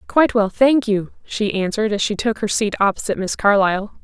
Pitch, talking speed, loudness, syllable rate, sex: 210 Hz, 210 wpm, -18 LUFS, 6.1 syllables/s, female